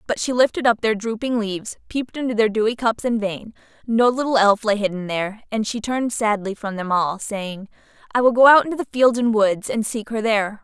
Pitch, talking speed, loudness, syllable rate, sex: 220 Hz, 230 wpm, -20 LUFS, 5.7 syllables/s, female